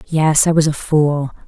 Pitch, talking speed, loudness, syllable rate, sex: 150 Hz, 205 wpm, -15 LUFS, 4.1 syllables/s, female